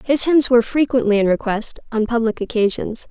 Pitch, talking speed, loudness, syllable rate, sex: 235 Hz, 175 wpm, -18 LUFS, 5.5 syllables/s, female